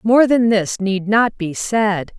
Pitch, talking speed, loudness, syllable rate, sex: 210 Hz, 190 wpm, -17 LUFS, 3.4 syllables/s, female